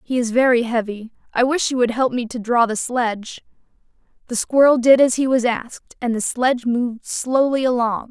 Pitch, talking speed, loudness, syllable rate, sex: 245 Hz, 200 wpm, -18 LUFS, 5.2 syllables/s, female